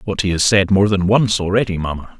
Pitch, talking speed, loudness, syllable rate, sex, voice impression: 95 Hz, 245 wpm, -16 LUFS, 5.8 syllables/s, male, masculine, middle-aged, thick, tensed, slightly hard, clear, fluent, slightly cool, calm, mature, slightly friendly, wild, lively, strict